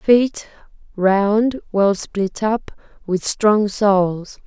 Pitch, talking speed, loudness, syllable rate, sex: 205 Hz, 95 wpm, -18 LUFS, 2.6 syllables/s, female